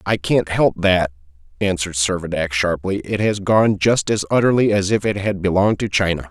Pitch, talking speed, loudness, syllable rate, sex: 95 Hz, 190 wpm, -18 LUFS, 5.3 syllables/s, male